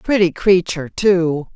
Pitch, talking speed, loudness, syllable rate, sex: 180 Hz, 115 wpm, -16 LUFS, 4.1 syllables/s, female